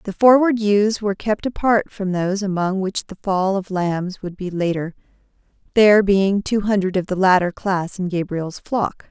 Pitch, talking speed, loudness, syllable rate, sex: 195 Hz, 185 wpm, -19 LUFS, 4.7 syllables/s, female